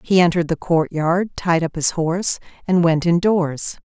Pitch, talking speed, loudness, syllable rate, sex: 170 Hz, 170 wpm, -19 LUFS, 4.8 syllables/s, female